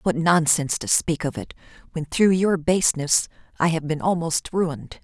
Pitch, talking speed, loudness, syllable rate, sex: 165 Hz, 180 wpm, -21 LUFS, 5.0 syllables/s, female